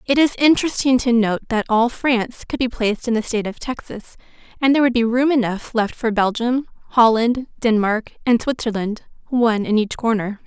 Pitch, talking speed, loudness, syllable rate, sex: 235 Hz, 190 wpm, -19 LUFS, 5.6 syllables/s, female